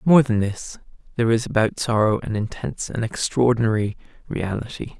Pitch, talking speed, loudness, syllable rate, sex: 115 Hz, 145 wpm, -22 LUFS, 5.5 syllables/s, male